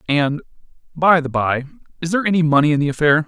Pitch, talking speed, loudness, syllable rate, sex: 155 Hz, 200 wpm, -17 LUFS, 6.9 syllables/s, male